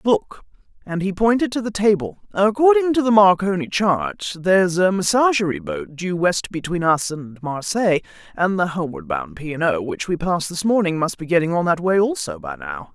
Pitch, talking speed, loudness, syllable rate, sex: 190 Hz, 195 wpm, -20 LUFS, 5.2 syllables/s, female